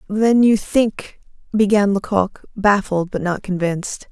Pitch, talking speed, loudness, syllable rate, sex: 200 Hz, 130 wpm, -18 LUFS, 4.2 syllables/s, female